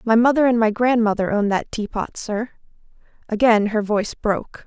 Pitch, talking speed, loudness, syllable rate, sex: 220 Hz, 165 wpm, -20 LUFS, 5.5 syllables/s, female